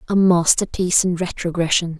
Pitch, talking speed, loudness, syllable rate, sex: 175 Hz, 120 wpm, -18 LUFS, 5.5 syllables/s, female